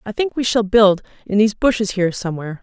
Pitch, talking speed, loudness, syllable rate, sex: 210 Hz, 230 wpm, -17 LUFS, 7.0 syllables/s, female